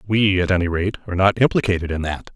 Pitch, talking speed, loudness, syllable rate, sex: 95 Hz, 230 wpm, -19 LUFS, 6.8 syllables/s, male